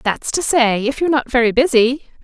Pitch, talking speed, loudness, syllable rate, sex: 255 Hz, 215 wpm, -16 LUFS, 5.6 syllables/s, female